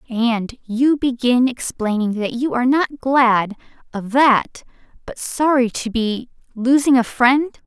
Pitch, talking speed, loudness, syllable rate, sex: 245 Hz, 135 wpm, -18 LUFS, 3.8 syllables/s, female